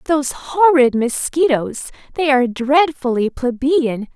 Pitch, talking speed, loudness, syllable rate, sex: 275 Hz, 85 wpm, -16 LUFS, 4.0 syllables/s, female